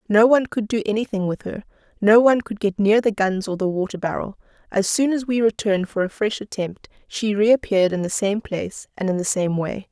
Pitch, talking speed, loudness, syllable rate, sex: 205 Hz, 230 wpm, -21 LUFS, 5.7 syllables/s, female